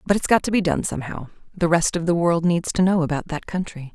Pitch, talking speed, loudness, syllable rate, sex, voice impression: 170 Hz, 275 wpm, -21 LUFS, 6.1 syllables/s, female, feminine, adult-like, sincere, calm, elegant